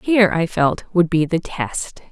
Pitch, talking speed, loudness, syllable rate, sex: 175 Hz, 200 wpm, -19 LUFS, 4.4 syllables/s, female